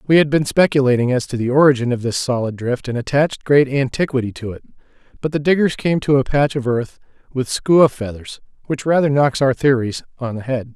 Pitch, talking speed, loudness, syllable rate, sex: 135 Hz, 210 wpm, -17 LUFS, 5.7 syllables/s, male